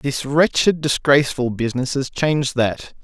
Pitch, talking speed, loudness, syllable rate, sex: 135 Hz, 140 wpm, -19 LUFS, 4.8 syllables/s, male